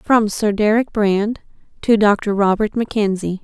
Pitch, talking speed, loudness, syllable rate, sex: 210 Hz, 140 wpm, -17 LUFS, 4.0 syllables/s, female